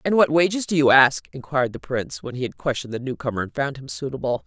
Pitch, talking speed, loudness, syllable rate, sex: 145 Hz, 270 wpm, -22 LUFS, 6.8 syllables/s, female